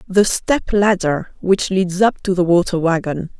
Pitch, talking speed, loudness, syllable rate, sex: 185 Hz, 160 wpm, -17 LUFS, 4.1 syllables/s, female